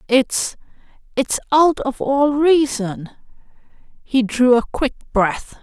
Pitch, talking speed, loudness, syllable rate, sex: 255 Hz, 105 wpm, -18 LUFS, 3.3 syllables/s, female